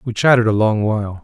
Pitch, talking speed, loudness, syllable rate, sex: 110 Hz, 245 wpm, -16 LUFS, 7.1 syllables/s, male